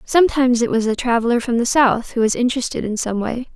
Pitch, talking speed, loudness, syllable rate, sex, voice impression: 240 Hz, 235 wpm, -18 LUFS, 6.5 syllables/s, female, very feminine, young, very thin, slightly relaxed, slightly weak, bright, soft, very clear, very fluent, very cute, intellectual, very refreshing, sincere, calm, very friendly, reassuring, very unique, very elegant, slightly wild, very sweet, lively, kind, modest, light